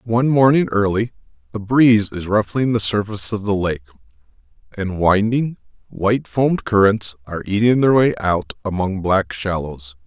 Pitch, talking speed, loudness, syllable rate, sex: 105 Hz, 150 wpm, -18 LUFS, 5.1 syllables/s, male